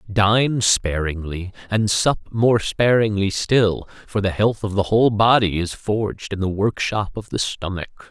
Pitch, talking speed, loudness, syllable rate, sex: 105 Hz, 165 wpm, -20 LUFS, 4.1 syllables/s, male